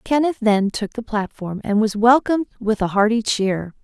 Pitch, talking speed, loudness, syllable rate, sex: 220 Hz, 190 wpm, -19 LUFS, 4.9 syllables/s, female